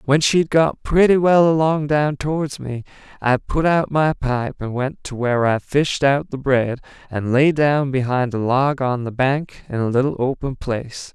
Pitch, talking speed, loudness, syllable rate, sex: 140 Hz, 200 wpm, -19 LUFS, 4.4 syllables/s, male